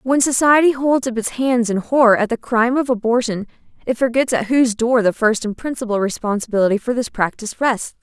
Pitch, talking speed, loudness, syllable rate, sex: 235 Hz, 200 wpm, -17 LUFS, 5.8 syllables/s, female